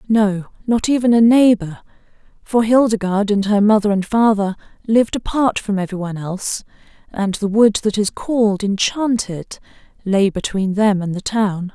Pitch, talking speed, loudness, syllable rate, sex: 210 Hz, 160 wpm, -17 LUFS, 5.0 syllables/s, female